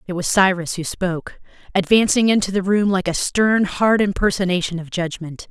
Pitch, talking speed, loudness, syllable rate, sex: 190 Hz, 175 wpm, -19 LUFS, 5.2 syllables/s, female